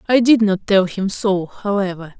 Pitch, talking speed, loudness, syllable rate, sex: 200 Hz, 190 wpm, -17 LUFS, 4.6 syllables/s, female